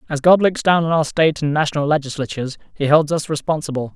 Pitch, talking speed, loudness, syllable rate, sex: 150 Hz, 210 wpm, -18 LUFS, 6.7 syllables/s, male